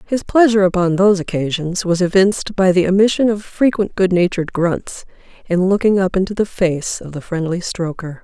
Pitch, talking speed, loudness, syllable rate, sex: 185 Hz, 175 wpm, -16 LUFS, 5.5 syllables/s, female